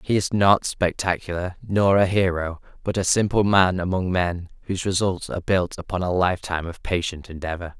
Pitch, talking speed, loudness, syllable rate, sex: 90 Hz, 175 wpm, -22 LUFS, 5.4 syllables/s, male